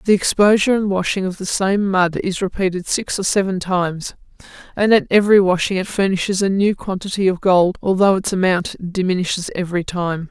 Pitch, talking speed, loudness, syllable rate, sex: 190 Hz, 180 wpm, -17 LUFS, 5.6 syllables/s, female